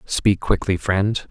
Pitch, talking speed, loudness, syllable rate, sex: 95 Hz, 140 wpm, -20 LUFS, 3.3 syllables/s, male